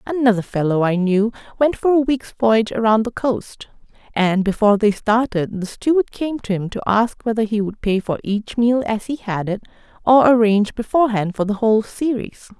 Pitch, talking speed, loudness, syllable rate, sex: 220 Hz, 195 wpm, -18 LUFS, 5.2 syllables/s, female